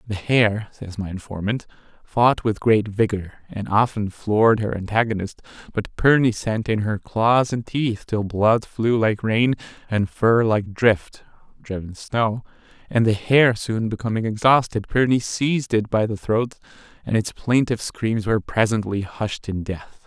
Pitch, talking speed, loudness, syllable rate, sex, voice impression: 110 Hz, 160 wpm, -21 LUFS, 4.3 syllables/s, male, masculine, adult-like, slightly muffled, slightly cool, sincere, calm